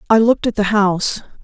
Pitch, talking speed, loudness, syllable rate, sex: 210 Hz, 210 wpm, -16 LUFS, 6.6 syllables/s, female